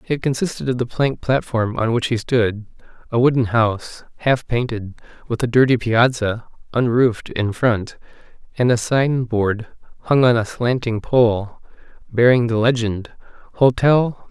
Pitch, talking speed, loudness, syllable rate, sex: 120 Hz, 145 wpm, -18 LUFS, 4.4 syllables/s, male